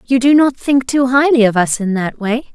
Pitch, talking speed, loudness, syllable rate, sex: 245 Hz, 260 wpm, -14 LUFS, 4.9 syllables/s, female